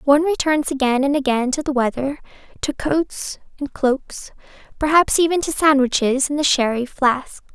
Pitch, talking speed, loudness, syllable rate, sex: 280 Hz, 160 wpm, -19 LUFS, 4.8 syllables/s, female